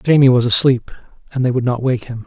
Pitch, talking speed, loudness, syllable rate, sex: 125 Hz, 240 wpm, -15 LUFS, 6.1 syllables/s, male